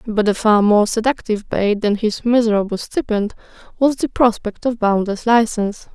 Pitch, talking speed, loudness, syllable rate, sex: 220 Hz, 160 wpm, -17 LUFS, 5.1 syllables/s, female